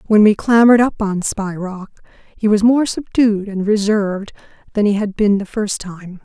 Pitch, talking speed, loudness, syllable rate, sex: 205 Hz, 190 wpm, -16 LUFS, 4.8 syllables/s, female